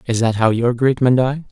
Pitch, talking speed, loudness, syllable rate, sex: 125 Hz, 280 wpm, -16 LUFS, 5.2 syllables/s, male